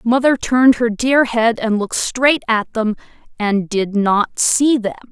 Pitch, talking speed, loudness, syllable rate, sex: 235 Hz, 175 wpm, -16 LUFS, 4.1 syllables/s, female